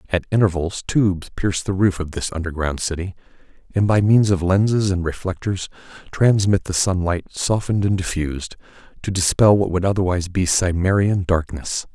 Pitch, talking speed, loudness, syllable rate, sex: 95 Hz, 155 wpm, -20 LUFS, 5.4 syllables/s, male